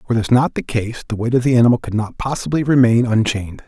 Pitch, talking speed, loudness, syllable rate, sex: 120 Hz, 245 wpm, -17 LUFS, 6.8 syllables/s, male